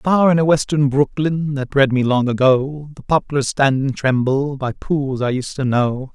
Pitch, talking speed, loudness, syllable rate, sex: 140 Hz, 205 wpm, -18 LUFS, 4.3 syllables/s, male